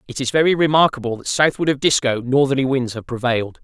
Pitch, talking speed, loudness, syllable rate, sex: 135 Hz, 200 wpm, -18 LUFS, 6.4 syllables/s, male